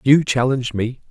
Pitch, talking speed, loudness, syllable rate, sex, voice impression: 125 Hz, 165 wpm, -19 LUFS, 5.3 syllables/s, male, very masculine, very adult-like, very middle-aged, very thick, slightly relaxed, slightly weak, slightly dark, slightly soft, slightly muffled, slightly fluent, slightly cool, intellectual, sincere, very calm, mature, friendly, reassuring, slightly unique, wild, slightly sweet, kind, modest